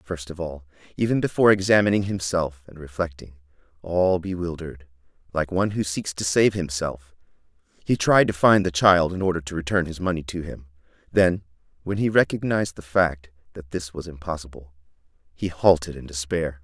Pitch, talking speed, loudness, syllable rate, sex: 85 Hz, 165 wpm, -23 LUFS, 5.5 syllables/s, male